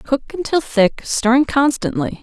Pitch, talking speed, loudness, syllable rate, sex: 260 Hz, 135 wpm, -17 LUFS, 4.4 syllables/s, female